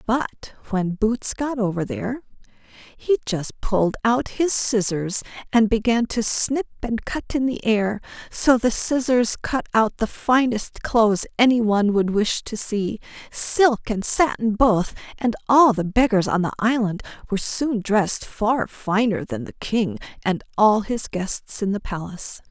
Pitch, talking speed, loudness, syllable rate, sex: 220 Hz, 165 wpm, -21 LUFS, 4.2 syllables/s, female